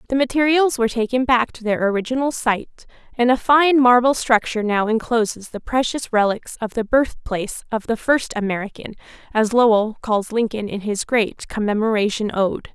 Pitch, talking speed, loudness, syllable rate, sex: 230 Hz, 165 wpm, -19 LUFS, 5.3 syllables/s, female